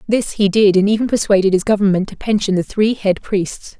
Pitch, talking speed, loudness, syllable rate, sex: 200 Hz, 220 wpm, -16 LUFS, 5.5 syllables/s, female